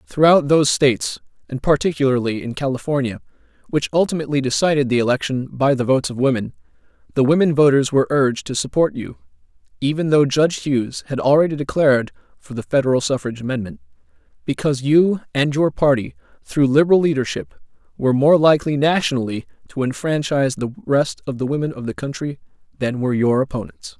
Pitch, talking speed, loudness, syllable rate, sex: 140 Hz, 160 wpm, -18 LUFS, 6.3 syllables/s, male